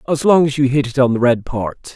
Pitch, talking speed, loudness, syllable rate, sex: 135 Hz, 310 wpm, -16 LUFS, 5.7 syllables/s, male